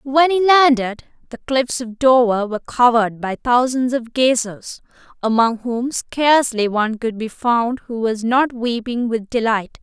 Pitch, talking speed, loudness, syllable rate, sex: 240 Hz, 160 wpm, -17 LUFS, 4.3 syllables/s, female